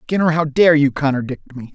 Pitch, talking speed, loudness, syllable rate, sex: 145 Hz, 205 wpm, -16 LUFS, 5.5 syllables/s, male